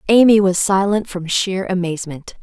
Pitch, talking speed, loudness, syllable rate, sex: 190 Hz, 150 wpm, -16 LUFS, 4.9 syllables/s, female